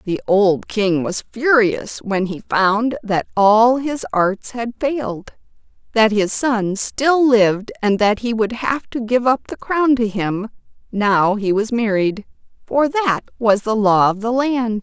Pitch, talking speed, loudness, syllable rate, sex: 225 Hz, 175 wpm, -17 LUFS, 3.7 syllables/s, female